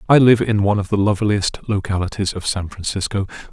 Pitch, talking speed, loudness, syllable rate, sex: 100 Hz, 190 wpm, -19 LUFS, 6.3 syllables/s, male